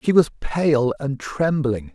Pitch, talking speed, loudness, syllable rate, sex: 140 Hz, 155 wpm, -21 LUFS, 3.6 syllables/s, male